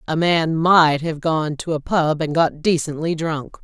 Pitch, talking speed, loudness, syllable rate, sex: 160 Hz, 200 wpm, -19 LUFS, 4.1 syllables/s, female